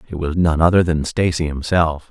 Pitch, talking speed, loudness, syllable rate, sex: 80 Hz, 200 wpm, -18 LUFS, 5.1 syllables/s, male